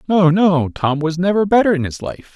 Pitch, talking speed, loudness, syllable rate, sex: 175 Hz, 230 wpm, -16 LUFS, 5.1 syllables/s, male